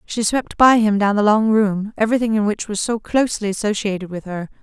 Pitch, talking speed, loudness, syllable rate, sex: 210 Hz, 220 wpm, -18 LUFS, 5.7 syllables/s, female